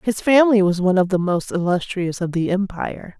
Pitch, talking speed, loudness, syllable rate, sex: 190 Hz, 205 wpm, -19 LUFS, 5.9 syllables/s, female